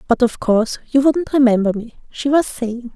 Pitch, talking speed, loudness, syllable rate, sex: 250 Hz, 205 wpm, -17 LUFS, 5.1 syllables/s, female